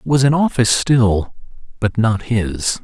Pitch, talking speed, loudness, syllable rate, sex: 115 Hz, 170 wpm, -16 LUFS, 4.3 syllables/s, male